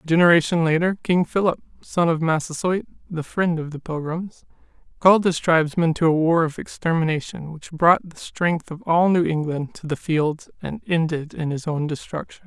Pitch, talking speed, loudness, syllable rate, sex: 165 Hz, 185 wpm, -21 LUFS, 5.1 syllables/s, male